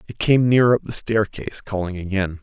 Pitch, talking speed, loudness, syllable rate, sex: 105 Hz, 200 wpm, -20 LUFS, 5.8 syllables/s, male